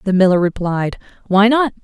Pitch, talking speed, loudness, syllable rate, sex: 200 Hz, 165 wpm, -15 LUFS, 5.2 syllables/s, female